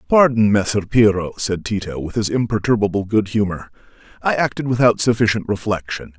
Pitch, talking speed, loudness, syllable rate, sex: 110 Hz, 145 wpm, -18 LUFS, 5.5 syllables/s, male